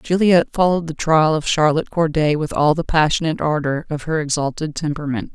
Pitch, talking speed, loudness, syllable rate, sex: 155 Hz, 180 wpm, -18 LUFS, 6.1 syllables/s, female